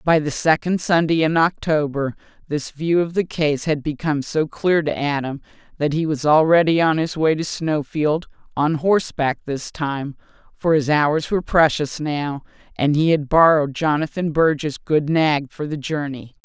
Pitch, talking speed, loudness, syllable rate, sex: 155 Hz, 170 wpm, -20 LUFS, 4.6 syllables/s, female